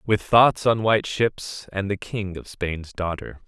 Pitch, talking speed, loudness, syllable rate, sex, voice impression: 100 Hz, 190 wpm, -22 LUFS, 4.0 syllables/s, male, very masculine, very adult-like, slightly old, very thick, tensed, very powerful, bright, hard, very clear, very fluent, very cool, intellectual, sincere, very calm, very mature, very friendly, very reassuring, very unique, elegant, very wild, sweet, very lively, very kind